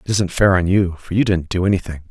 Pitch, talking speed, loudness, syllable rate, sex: 90 Hz, 285 wpm, -18 LUFS, 6.3 syllables/s, male